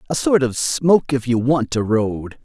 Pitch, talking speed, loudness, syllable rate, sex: 130 Hz, 220 wpm, -18 LUFS, 4.5 syllables/s, male